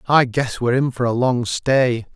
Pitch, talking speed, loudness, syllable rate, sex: 125 Hz, 225 wpm, -19 LUFS, 4.7 syllables/s, male